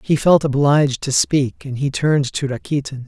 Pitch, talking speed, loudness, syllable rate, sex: 140 Hz, 195 wpm, -18 LUFS, 5.1 syllables/s, male